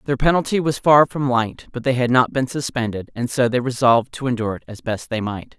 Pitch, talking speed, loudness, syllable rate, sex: 125 Hz, 245 wpm, -20 LUFS, 5.8 syllables/s, female